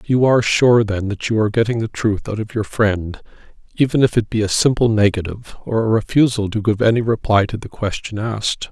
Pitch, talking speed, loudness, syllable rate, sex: 110 Hz, 220 wpm, -18 LUFS, 5.8 syllables/s, male